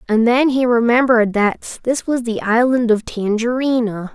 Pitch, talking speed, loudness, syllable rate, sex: 235 Hz, 160 wpm, -16 LUFS, 4.6 syllables/s, female